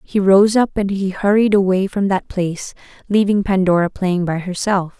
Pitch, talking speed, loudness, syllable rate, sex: 195 Hz, 180 wpm, -16 LUFS, 4.8 syllables/s, female